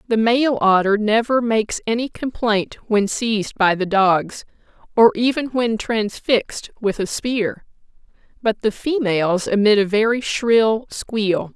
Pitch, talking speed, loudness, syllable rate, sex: 220 Hz, 140 wpm, -19 LUFS, 4.1 syllables/s, female